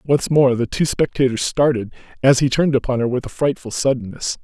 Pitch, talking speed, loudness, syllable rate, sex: 130 Hz, 205 wpm, -18 LUFS, 5.7 syllables/s, male